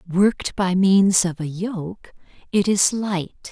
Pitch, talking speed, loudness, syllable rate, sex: 190 Hz, 155 wpm, -20 LUFS, 3.4 syllables/s, female